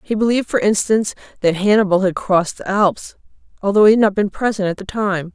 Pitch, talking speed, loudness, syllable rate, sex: 200 Hz, 215 wpm, -17 LUFS, 6.2 syllables/s, female